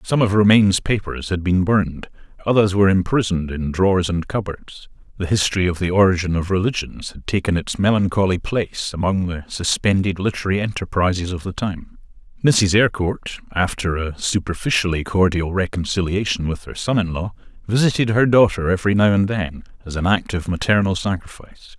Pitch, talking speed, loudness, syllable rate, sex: 95 Hz, 160 wpm, -19 LUFS, 4.9 syllables/s, male